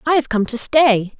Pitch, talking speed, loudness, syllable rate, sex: 255 Hz, 250 wpm, -16 LUFS, 4.7 syllables/s, female